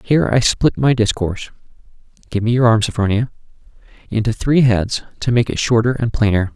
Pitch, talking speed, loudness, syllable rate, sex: 115 Hz, 175 wpm, -17 LUFS, 4.9 syllables/s, male